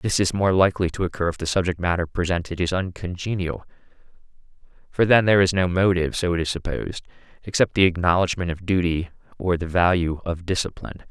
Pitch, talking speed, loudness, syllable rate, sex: 90 Hz, 180 wpm, -22 LUFS, 5.9 syllables/s, male